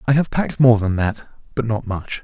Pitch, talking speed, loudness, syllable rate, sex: 115 Hz, 240 wpm, -19 LUFS, 5.2 syllables/s, male